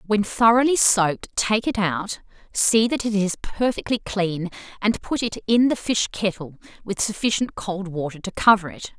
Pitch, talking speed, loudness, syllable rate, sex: 205 Hz, 175 wpm, -21 LUFS, 4.7 syllables/s, female